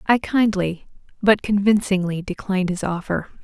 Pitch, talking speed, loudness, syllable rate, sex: 195 Hz, 120 wpm, -21 LUFS, 4.9 syllables/s, female